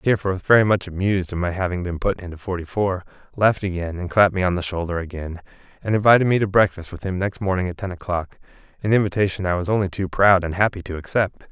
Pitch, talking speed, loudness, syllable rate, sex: 95 Hz, 225 wpm, -21 LUFS, 6.6 syllables/s, male